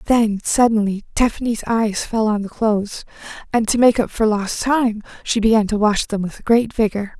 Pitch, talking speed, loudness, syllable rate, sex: 220 Hz, 190 wpm, -18 LUFS, 4.9 syllables/s, female